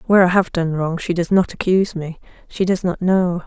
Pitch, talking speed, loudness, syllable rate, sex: 175 Hz, 225 wpm, -18 LUFS, 5.6 syllables/s, female